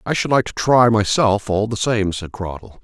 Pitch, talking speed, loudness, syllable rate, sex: 105 Hz, 235 wpm, -18 LUFS, 4.8 syllables/s, male